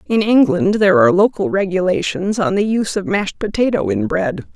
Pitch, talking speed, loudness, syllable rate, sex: 210 Hz, 185 wpm, -16 LUFS, 5.5 syllables/s, female